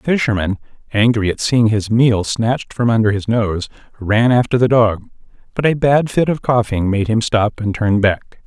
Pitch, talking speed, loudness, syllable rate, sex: 110 Hz, 200 wpm, -16 LUFS, 4.8 syllables/s, male